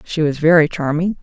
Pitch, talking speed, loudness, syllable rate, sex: 155 Hz, 195 wpm, -16 LUFS, 5.4 syllables/s, female